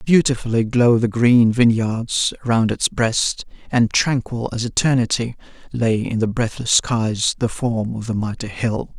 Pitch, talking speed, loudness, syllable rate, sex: 115 Hz, 155 wpm, -19 LUFS, 4.2 syllables/s, male